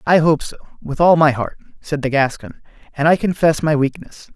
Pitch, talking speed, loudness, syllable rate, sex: 150 Hz, 205 wpm, -17 LUFS, 5.3 syllables/s, male